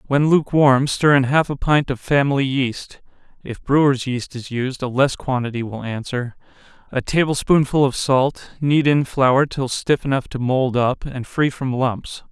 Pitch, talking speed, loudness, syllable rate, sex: 135 Hz, 185 wpm, -19 LUFS, 3.5 syllables/s, male